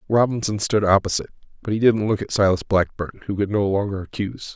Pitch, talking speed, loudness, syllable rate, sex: 100 Hz, 200 wpm, -21 LUFS, 6.5 syllables/s, male